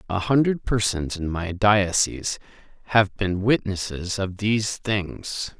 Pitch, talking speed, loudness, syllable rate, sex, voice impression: 100 Hz, 130 wpm, -23 LUFS, 3.9 syllables/s, male, masculine, middle-aged, relaxed, slightly weak, halting, raspy, mature, wild, slightly strict